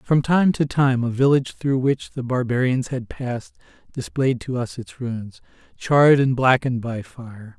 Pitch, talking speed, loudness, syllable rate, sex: 125 Hz, 175 wpm, -21 LUFS, 4.6 syllables/s, male